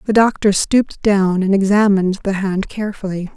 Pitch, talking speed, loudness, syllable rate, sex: 200 Hz, 160 wpm, -16 LUFS, 5.5 syllables/s, female